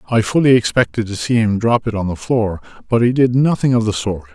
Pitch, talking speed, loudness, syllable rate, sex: 115 Hz, 250 wpm, -16 LUFS, 5.8 syllables/s, male